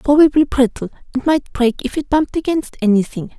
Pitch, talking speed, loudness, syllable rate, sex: 265 Hz, 195 wpm, -17 LUFS, 5.7 syllables/s, female